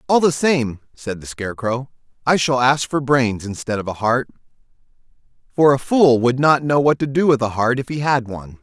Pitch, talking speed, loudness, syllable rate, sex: 130 Hz, 215 wpm, -18 LUFS, 5.2 syllables/s, male